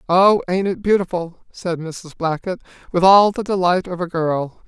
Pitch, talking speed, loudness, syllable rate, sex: 180 Hz, 180 wpm, -18 LUFS, 4.5 syllables/s, male